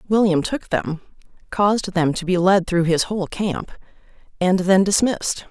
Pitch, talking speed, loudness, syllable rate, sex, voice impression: 185 Hz, 165 wpm, -19 LUFS, 4.7 syllables/s, female, very feminine, middle-aged, thin, slightly tensed, slightly powerful, bright, hard, very clear, very fluent, cool, very intellectual, refreshing, sincere, very calm, slightly friendly, reassuring, unique, very elegant, sweet, lively, strict, slightly intense, sharp